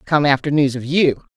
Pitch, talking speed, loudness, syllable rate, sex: 145 Hz, 220 wpm, -17 LUFS, 5.1 syllables/s, female